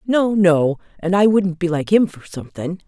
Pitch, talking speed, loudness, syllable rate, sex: 180 Hz, 210 wpm, -18 LUFS, 4.8 syllables/s, female